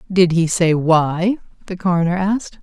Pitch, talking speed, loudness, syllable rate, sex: 180 Hz, 160 wpm, -17 LUFS, 4.7 syllables/s, female